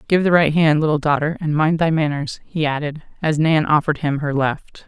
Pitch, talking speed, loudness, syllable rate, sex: 155 Hz, 220 wpm, -18 LUFS, 5.4 syllables/s, female